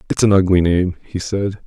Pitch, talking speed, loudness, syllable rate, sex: 95 Hz, 215 wpm, -17 LUFS, 5.3 syllables/s, male